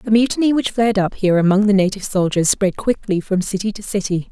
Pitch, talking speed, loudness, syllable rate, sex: 200 Hz, 220 wpm, -17 LUFS, 6.3 syllables/s, female